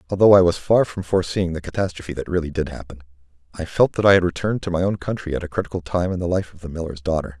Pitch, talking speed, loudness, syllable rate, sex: 85 Hz, 270 wpm, -21 LUFS, 7.2 syllables/s, male